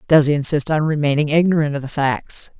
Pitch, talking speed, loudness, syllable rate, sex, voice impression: 150 Hz, 210 wpm, -17 LUFS, 5.9 syllables/s, female, very feminine, very adult-like, intellectual, slightly strict